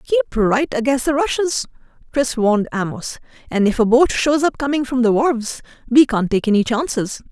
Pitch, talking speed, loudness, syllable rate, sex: 250 Hz, 190 wpm, -18 LUFS, 5.3 syllables/s, female